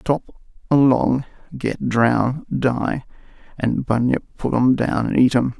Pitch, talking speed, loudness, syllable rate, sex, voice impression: 125 Hz, 140 wpm, -20 LUFS, 3.5 syllables/s, male, very masculine, very adult-like, slightly old, very thick, slightly tensed, slightly weak, dark, hard, muffled, slightly halting, raspy, cool, slightly intellectual, very sincere, very calm, very mature, friendly, slightly reassuring, unique, elegant, wild, very kind, very modest